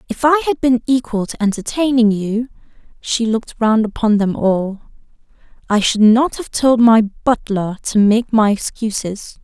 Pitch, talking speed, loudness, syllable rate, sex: 225 Hz, 145 wpm, -16 LUFS, 4.6 syllables/s, female